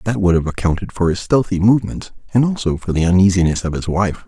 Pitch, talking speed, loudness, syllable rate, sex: 95 Hz, 225 wpm, -17 LUFS, 6.3 syllables/s, male